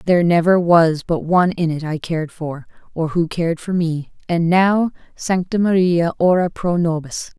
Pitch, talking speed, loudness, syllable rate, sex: 170 Hz, 160 wpm, -18 LUFS, 4.8 syllables/s, female